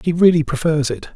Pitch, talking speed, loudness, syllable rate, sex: 155 Hz, 205 wpm, -17 LUFS, 5.7 syllables/s, male